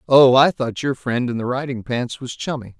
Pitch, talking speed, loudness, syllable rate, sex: 130 Hz, 235 wpm, -19 LUFS, 4.9 syllables/s, male